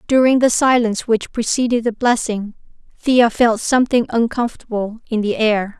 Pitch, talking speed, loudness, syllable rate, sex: 230 Hz, 145 wpm, -17 LUFS, 5.1 syllables/s, female